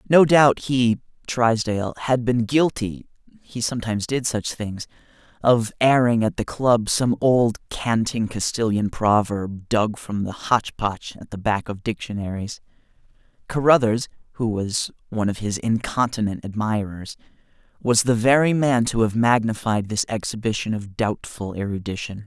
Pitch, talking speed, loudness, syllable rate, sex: 110 Hz, 135 wpm, -22 LUFS, 4.2 syllables/s, male